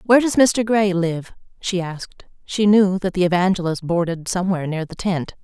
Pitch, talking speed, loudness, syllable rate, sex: 185 Hz, 190 wpm, -19 LUFS, 5.4 syllables/s, female